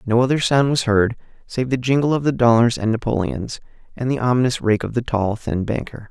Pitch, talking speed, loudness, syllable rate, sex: 120 Hz, 215 wpm, -19 LUFS, 5.6 syllables/s, male